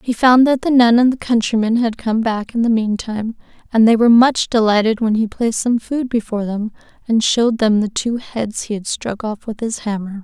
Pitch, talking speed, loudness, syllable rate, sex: 225 Hz, 230 wpm, -16 LUFS, 5.4 syllables/s, female